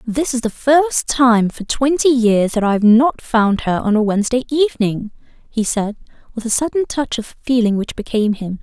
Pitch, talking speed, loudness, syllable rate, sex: 235 Hz, 200 wpm, -16 LUFS, 5.0 syllables/s, female